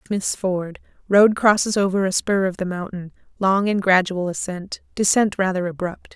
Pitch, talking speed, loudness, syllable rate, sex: 190 Hz, 155 wpm, -20 LUFS, 4.7 syllables/s, female